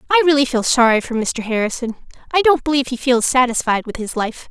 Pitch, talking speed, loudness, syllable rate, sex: 255 Hz, 215 wpm, -17 LUFS, 6.3 syllables/s, female